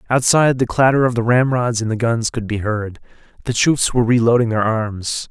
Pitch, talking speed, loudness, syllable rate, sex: 120 Hz, 215 wpm, -17 LUFS, 5.4 syllables/s, male